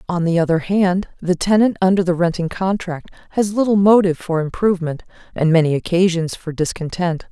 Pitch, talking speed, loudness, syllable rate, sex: 180 Hz, 165 wpm, -18 LUFS, 5.7 syllables/s, female